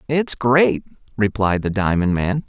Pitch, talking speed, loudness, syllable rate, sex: 115 Hz, 145 wpm, -18 LUFS, 4.0 syllables/s, male